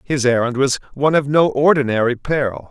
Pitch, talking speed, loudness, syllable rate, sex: 135 Hz, 180 wpm, -17 LUFS, 5.7 syllables/s, male